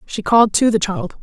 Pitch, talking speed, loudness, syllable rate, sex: 215 Hz, 245 wpm, -15 LUFS, 5.6 syllables/s, female